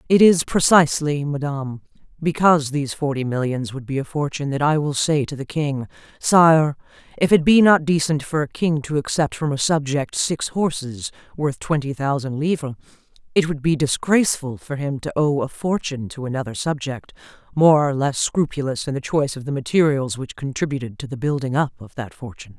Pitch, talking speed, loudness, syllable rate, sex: 145 Hz, 190 wpm, -20 LUFS, 5.5 syllables/s, female